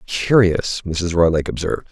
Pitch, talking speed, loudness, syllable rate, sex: 90 Hz, 125 wpm, -18 LUFS, 5.2 syllables/s, male